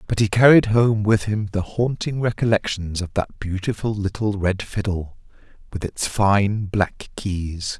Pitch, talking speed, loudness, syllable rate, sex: 100 Hz, 155 wpm, -21 LUFS, 4.2 syllables/s, male